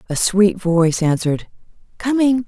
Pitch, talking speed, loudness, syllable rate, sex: 195 Hz, 120 wpm, -17 LUFS, 5.0 syllables/s, female